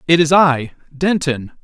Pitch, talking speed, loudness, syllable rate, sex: 155 Hz, 110 wpm, -15 LUFS, 3.9 syllables/s, male